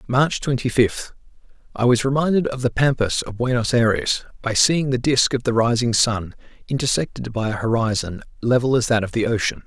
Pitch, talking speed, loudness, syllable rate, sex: 120 Hz, 180 wpm, -20 LUFS, 5.3 syllables/s, male